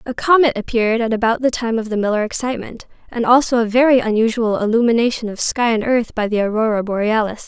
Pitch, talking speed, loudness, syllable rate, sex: 230 Hz, 200 wpm, -17 LUFS, 6.3 syllables/s, female